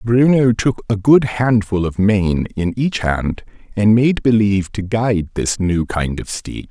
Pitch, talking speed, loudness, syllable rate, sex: 105 Hz, 180 wpm, -16 LUFS, 4.1 syllables/s, male